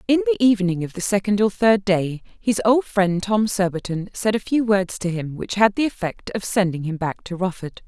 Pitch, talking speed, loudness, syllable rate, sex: 200 Hz, 230 wpm, -21 LUFS, 5.1 syllables/s, female